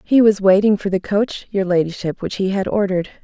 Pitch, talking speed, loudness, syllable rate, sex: 195 Hz, 220 wpm, -18 LUFS, 5.7 syllables/s, female